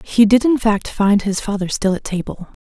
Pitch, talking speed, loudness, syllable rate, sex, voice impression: 210 Hz, 230 wpm, -17 LUFS, 4.9 syllables/s, female, very feminine, slightly young, very adult-like, very thin, slightly relaxed, slightly weak, bright, slightly hard, very clear, fluent, slightly raspy, very cute, slightly cool, very intellectual, very refreshing, very sincere, very calm, very friendly, very reassuring, unique, very elegant, very sweet, slightly lively, very kind, modest, light